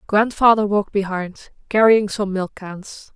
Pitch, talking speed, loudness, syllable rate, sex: 205 Hz, 135 wpm, -18 LUFS, 4.2 syllables/s, female